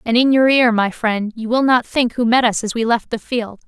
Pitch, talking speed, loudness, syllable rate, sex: 235 Hz, 295 wpm, -16 LUFS, 5.2 syllables/s, female